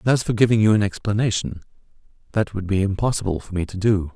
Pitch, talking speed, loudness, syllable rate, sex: 100 Hz, 215 wpm, -21 LUFS, 6.6 syllables/s, male